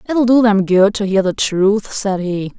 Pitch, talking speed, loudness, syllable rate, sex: 205 Hz, 230 wpm, -15 LUFS, 4.2 syllables/s, female